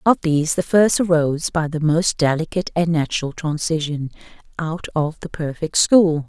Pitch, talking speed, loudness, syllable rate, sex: 160 Hz, 160 wpm, -19 LUFS, 5.0 syllables/s, female